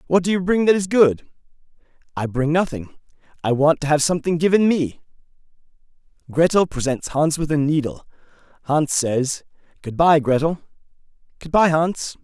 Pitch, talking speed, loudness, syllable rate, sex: 155 Hz, 140 wpm, -19 LUFS, 5.1 syllables/s, male